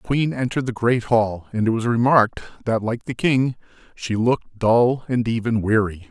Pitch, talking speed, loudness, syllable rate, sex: 115 Hz, 195 wpm, -20 LUFS, 5.1 syllables/s, male